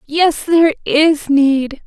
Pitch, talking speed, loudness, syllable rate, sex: 300 Hz, 130 wpm, -13 LUFS, 3.2 syllables/s, female